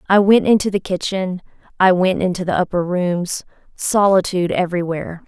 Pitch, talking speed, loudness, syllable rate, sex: 185 Hz, 150 wpm, -18 LUFS, 5.4 syllables/s, female